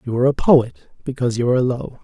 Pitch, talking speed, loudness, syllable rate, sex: 130 Hz, 235 wpm, -18 LUFS, 6.8 syllables/s, male